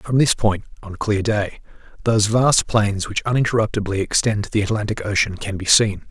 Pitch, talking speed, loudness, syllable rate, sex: 105 Hz, 195 wpm, -19 LUFS, 5.5 syllables/s, male